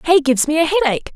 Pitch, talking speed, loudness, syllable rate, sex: 285 Hz, 260 wpm, -16 LUFS, 7.8 syllables/s, female